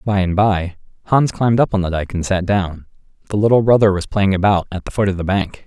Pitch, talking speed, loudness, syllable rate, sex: 95 Hz, 255 wpm, -17 LUFS, 5.9 syllables/s, male